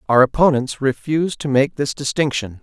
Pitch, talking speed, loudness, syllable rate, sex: 140 Hz, 160 wpm, -18 LUFS, 5.3 syllables/s, male